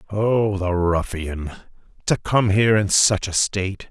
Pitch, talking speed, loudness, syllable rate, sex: 100 Hz, 155 wpm, -20 LUFS, 4.1 syllables/s, male